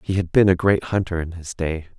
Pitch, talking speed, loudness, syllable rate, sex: 90 Hz, 270 wpm, -21 LUFS, 5.6 syllables/s, male